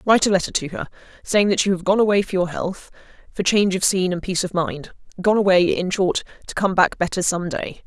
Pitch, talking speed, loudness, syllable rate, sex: 185 Hz, 235 wpm, -20 LUFS, 6.1 syllables/s, female